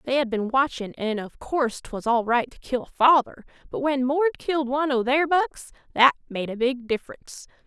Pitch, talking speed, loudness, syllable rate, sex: 260 Hz, 205 wpm, -23 LUFS, 5.2 syllables/s, female